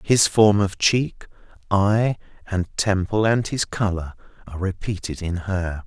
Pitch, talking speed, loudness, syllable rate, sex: 95 Hz, 145 wpm, -21 LUFS, 4.1 syllables/s, male